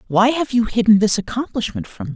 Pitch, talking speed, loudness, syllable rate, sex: 210 Hz, 225 wpm, -18 LUFS, 6.1 syllables/s, male